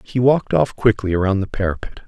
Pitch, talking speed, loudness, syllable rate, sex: 105 Hz, 205 wpm, -18 LUFS, 5.7 syllables/s, male